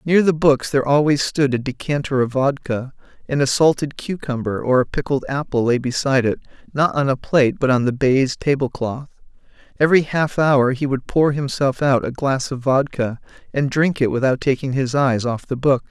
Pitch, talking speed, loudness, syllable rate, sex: 135 Hz, 200 wpm, -19 LUFS, 5.3 syllables/s, male